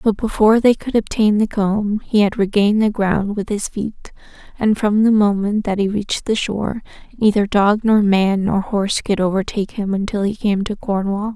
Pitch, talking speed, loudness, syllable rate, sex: 205 Hz, 200 wpm, -17 LUFS, 5.1 syllables/s, female